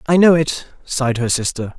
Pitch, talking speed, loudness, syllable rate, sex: 135 Hz, 200 wpm, -17 LUFS, 5.6 syllables/s, male